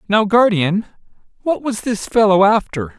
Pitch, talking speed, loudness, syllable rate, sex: 215 Hz, 140 wpm, -16 LUFS, 4.5 syllables/s, male